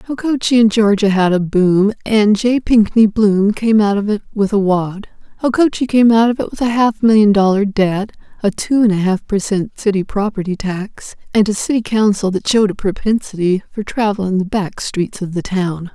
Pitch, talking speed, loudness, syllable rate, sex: 205 Hz, 205 wpm, -15 LUFS, 5.0 syllables/s, female